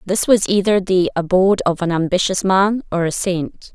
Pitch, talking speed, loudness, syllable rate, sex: 185 Hz, 190 wpm, -17 LUFS, 4.8 syllables/s, female